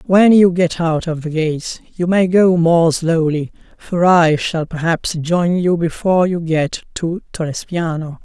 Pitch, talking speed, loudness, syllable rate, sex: 170 Hz, 165 wpm, -16 LUFS, 4.0 syllables/s, male